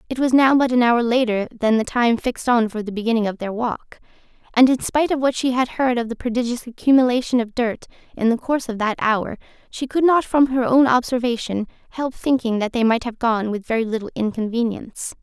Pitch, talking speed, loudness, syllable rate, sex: 240 Hz, 220 wpm, -20 LUFS, 5.9 syllables/s, female